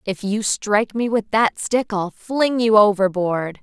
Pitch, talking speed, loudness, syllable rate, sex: 210 Hz, 180 wpm, -19 LUFS, 4.0 syllables/s, female